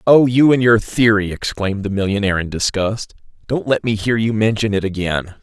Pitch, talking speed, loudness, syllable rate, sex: 105 Hz, 200 wpm, -17 LUFS, 5.5 syllables/s, male